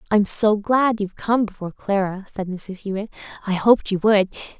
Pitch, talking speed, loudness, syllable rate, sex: 205 Hz, 185 wpm, -21 LUFS, 5.4 syllables/s, female